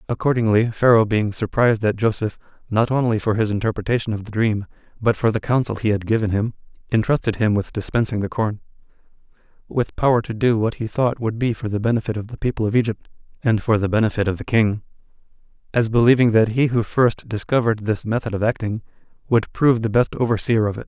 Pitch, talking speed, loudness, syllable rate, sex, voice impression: 110 Hz, 200 wpm, -20 LUFS, 6.2 syllables/s, male, masculine, adult-like, weak, slightly hard, fluent, intellectual, sincere, calm, slightly reassuring, modest